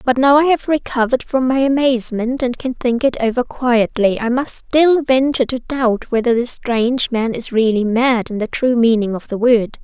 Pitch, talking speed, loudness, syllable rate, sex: 245 Hz, 205 wpm, -16 LUFS, 4.9 syllables/s, female